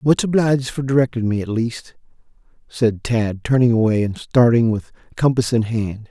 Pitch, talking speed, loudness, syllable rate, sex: 120 Hz, 165 wpm, -18 LUFS, 5.0 syllables/s, male